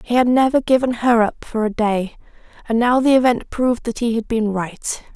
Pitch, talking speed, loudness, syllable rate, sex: 235 Hz, 220 wpm, -18 LUFS, 5.2 syllables/s, female